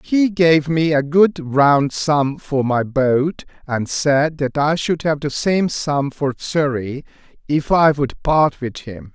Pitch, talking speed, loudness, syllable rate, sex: 145 Hz, 175 wpm, -18 LUFS, 3.4 syllables/s, male